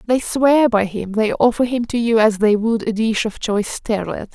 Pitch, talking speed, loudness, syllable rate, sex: 225 Hz, 235 wpm, -18 LUFS, 4.8 syllables/s, female